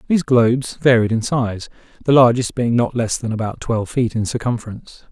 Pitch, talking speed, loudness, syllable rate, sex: 120 Hz, 190 wpm, -18 LUFS, 5.8 syllables/s, male